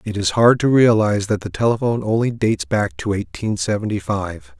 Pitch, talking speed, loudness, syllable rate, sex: 110 Hz, 195 wpm, -18 LUFS, 5.6 syllables/s, male